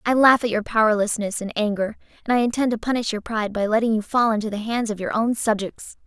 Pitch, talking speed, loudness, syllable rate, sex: 220 Hz, 245 wpm, -22 LUFS, 6.3 syllables/s, female